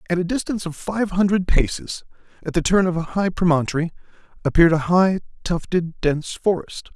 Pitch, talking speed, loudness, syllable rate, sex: 175 Hz, 175 wpm, -21 LUFS, 5.8 syllables/s, male